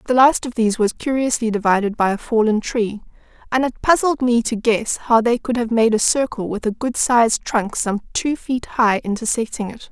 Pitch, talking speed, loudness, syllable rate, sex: 230 Hz, 210 wpm, -18 LUFS, 5.2 syllables/s, female